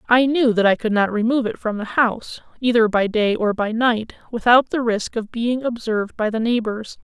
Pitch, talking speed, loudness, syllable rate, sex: 225 Hz, 220 wpm, -19 LUFS, 5.3 syllables/s, female